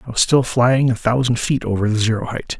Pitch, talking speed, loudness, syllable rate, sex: 120 Hz, 255 wpm, -17 LUFS, 5.7 syllables/s, male